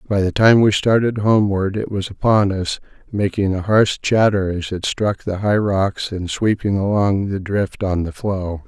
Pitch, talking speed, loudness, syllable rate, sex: 100 Hz, 195 wpm, -18 LUFS, 4.4 syllables/s, male